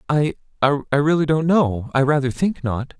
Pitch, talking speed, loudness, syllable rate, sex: 145 Hz, 160 wpm, -20 LUFS, 4.6 syllables/s, male